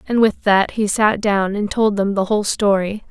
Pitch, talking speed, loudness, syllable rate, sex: 205 Hz, 230 wpm, -17 LUFS, 4.8 syllables/s, female